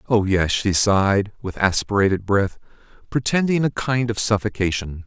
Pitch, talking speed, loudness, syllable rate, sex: 105 Hz, 140 wpm, -20 LUFS, 4.9 syllables/s, male